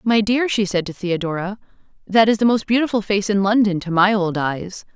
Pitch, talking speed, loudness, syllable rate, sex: 200 Hz, 220 wpm, -19 LUFS, 5.3 syllables/s, female